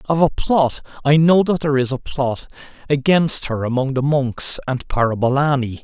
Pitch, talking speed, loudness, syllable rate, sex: 140 Hz, 155 wpm, -18 LUFS, 4.8 syllables/s, male